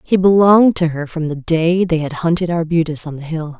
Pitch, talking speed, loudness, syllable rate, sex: 165 Hz, 235 wpm, -15 LUFS, 5.4 syllables/s, female